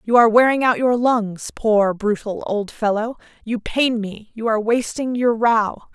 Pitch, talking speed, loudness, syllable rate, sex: 225 Hz, 180 wpm, -19 LUFS, 4.4 syllables/s, female